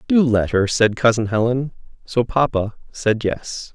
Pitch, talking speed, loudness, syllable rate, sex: 120 Hz, 160 wpm, -19 LUFS, 4.1 syllables/s, male